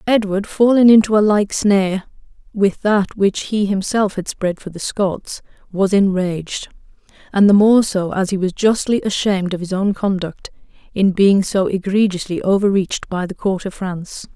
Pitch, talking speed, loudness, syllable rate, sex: 195 Hz, 170 wpm, -17 LUFS, 4.8 syllables/s, female